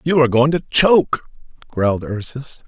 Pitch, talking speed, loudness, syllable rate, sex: 135 Hz, 155 wpm, -16 LUFS, 5.0 syllables/s, male